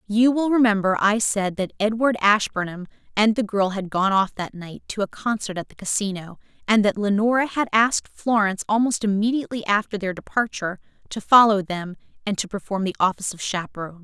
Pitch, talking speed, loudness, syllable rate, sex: 205 Hz, 185 wpm, -22 LUFS, 5.8 syllables/s, female